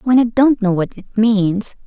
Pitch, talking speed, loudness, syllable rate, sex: 215 Hz, 225 wpm, -16 LUFS, 4.1 syllables/s, female